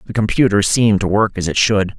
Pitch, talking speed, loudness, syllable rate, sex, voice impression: 105 Hz, 240 wpm, -15 LUFS, 6.1 syllables/s, male, very masculine, adult-like, slightly middle-aged, thick, very tensed, slightly powerful, very bright, clear, fluent, very cool, very intellectual, refreshing, sincere, calm, slightly mature, friendly, sweet, lively, kind